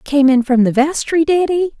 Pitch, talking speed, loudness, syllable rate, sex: 290 Hz, 235 wpm, -14 LUFS, 4.9 syllables/s, female